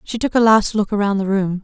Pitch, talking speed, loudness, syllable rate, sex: 205 Hz, 295 wpm, -17 LUFS, 5.2 syllables/s, female